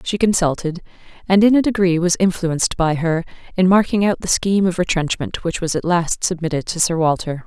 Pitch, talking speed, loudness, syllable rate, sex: 175 Hz, 200 wpm, -18 LUFS, 5.6 syllables/s, female